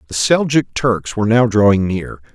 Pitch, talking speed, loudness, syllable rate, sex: 115 Hz, 180 wpm, -15 LUFS, 5.3 syllables/s, male